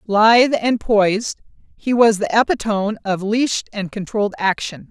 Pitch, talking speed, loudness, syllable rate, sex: 215 Hz, 145 wpm, -17 LUFS, 4.9 syllables/s, female